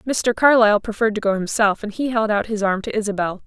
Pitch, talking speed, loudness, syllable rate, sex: 215 Hz, 245 wpm, -19 LUFS, 6.2 syllables/s, female